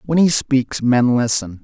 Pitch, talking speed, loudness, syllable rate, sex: 130 Hz, 185 wpm, -16 LUFS, 4.0 syllables/s, male